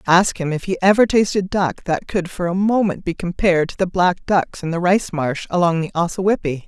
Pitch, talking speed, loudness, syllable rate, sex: 180 Hz, 225 wpm, -19 LUFS, 5.3 syllables/s, female